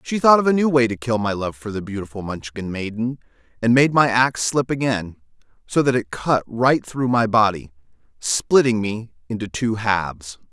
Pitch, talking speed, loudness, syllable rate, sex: 115 Hz, 195 wpm, -20 LUFS, 5.0 syllables/s, male